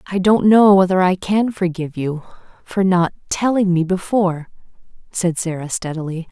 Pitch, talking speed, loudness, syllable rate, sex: 185 Hz, 150 wpm, -17 LUFS, 5.0 syllables/s, female